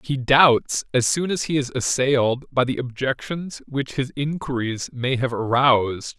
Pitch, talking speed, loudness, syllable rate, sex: 130 Hz, 165 wpm, -21 LUFS, 4.3 syllables/s, male